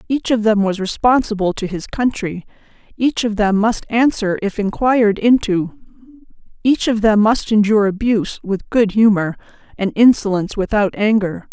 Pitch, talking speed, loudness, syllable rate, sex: 215 Hz, 150 wpm, -16 LUFS, 5.0 syllables/s, female